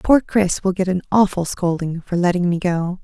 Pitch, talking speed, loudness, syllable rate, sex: 180 Hz, 215 wpm, -19 LUFS, 5.0 syllables/s, female